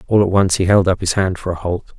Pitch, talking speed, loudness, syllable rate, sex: 95 Hz, 330 wpm, -16 LUFS, 6.4 syllables/s, male